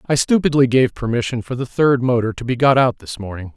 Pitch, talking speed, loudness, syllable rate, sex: 125 Hz, 235 wpm, -17 LUFS, 5.8 syllables/s, male